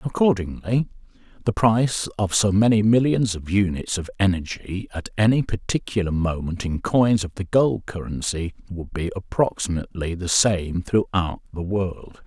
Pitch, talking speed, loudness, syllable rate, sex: 100 Hz, 140 wpm, -22 LUFS, 4.7 syllables/s, male